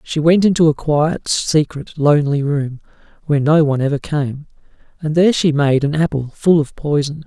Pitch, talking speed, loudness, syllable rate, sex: 150 Hz, 180 wpm, -16 LUFS, 5.2 syllables/s, male